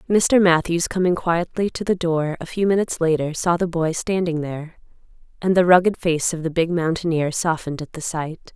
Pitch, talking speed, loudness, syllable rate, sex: 170 Hz, 195 wpm, -20 LUFS, 5.3 syllables/s, female